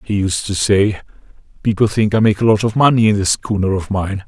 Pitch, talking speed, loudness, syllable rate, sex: 100 Hz, 240 wpm, -15 LUFS, 5.7 syllables/s, male